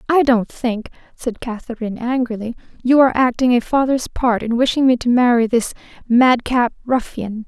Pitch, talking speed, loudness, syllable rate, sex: 240 Hz, 170 wpm, -17 LUFS, 5.1 syllables/s, female